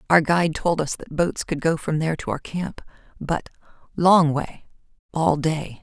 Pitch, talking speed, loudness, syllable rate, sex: 160 Hz, 165 wpm, -22 LUFS, 4.6 syllables/s, female